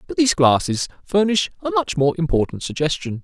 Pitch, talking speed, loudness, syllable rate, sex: 180 Hz, 165 wpm, -20 LUFS, 5.7 syllables/s, male